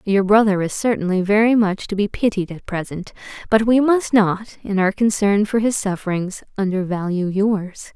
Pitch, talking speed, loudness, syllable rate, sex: 205 Hz, 175 wpm, -19 LUFS, 4.8 syllables/s, female